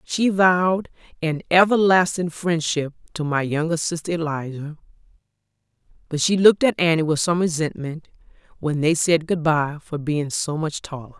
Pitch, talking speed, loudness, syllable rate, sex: 165 Hz, 150 wpm, -21 LUFS, 4.9 syllables/s, female